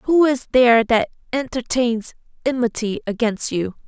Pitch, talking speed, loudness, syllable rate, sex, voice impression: 245 Hz, 125 wpm, -19 LUFS, 4.5 syllables/s, female, feminine, adult-like, slightly clear, slightly cute, refreshing, friendly